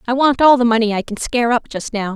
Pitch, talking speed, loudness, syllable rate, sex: 235 Hz, 305 wpm, -16 LUFS, 6.7 syllables/s, female